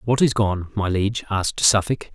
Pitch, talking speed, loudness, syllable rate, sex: 105 Hz, 195 wpm, -21 LUFS, 5.1 syllables/s, male